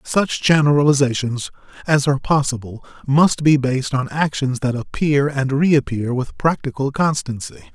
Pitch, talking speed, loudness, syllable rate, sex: 140 Hz, 130 wpm, -18 LUFS, 4.8 syllables/s, male